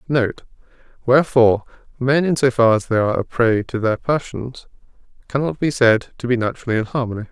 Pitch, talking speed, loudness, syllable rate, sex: 125 Hz, 180 wpm, -18 LUFS, 6.2 syllables/s, male